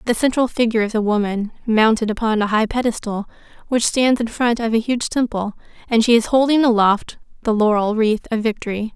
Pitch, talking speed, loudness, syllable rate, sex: 225 Hz, 195 wpm, -18 LUFS, 5.7 syllables/s, female